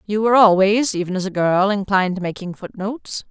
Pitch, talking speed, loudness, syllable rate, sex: 200 Hz, 200 wpm, -18 LUFS, 6.0 syllables/s, female